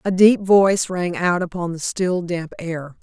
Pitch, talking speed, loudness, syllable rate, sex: 180 Hz, 200 wpm, -19 LUFS, 4.2 syllables/s, female